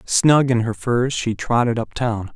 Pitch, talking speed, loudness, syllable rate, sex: 120 Hz, 205 wpm, -19 LUFS, 4.0 syllables/s, male